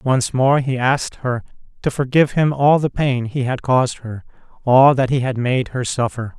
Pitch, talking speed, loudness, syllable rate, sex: 130 Hz, 205 wpm, -18 LUFS, 4.9 syllables/s, male